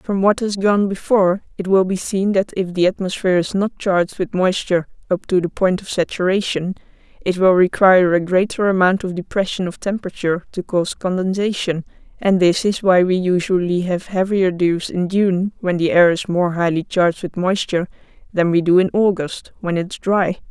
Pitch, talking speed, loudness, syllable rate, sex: 185 Hz, 195 wpm, -18 LUFS, 5.4 syllables/s, female